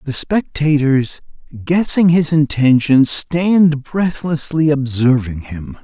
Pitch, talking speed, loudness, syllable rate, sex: 145 Hz, 95 wpm, -15 LUFS, 3.4 syllables/s, male